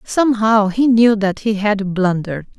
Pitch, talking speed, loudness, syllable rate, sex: 210 Hz, 160 wpm, -15 LUFS, 4.6 syllables/s, female